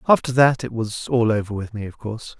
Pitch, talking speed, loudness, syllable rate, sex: 115 Hz, 250 wpm, -21 LUFS, 6.0 syllables/s, male